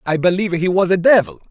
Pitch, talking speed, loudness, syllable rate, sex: 180 Hz, 240 wpm, -15 LUFS, 6.6 syllables/s, male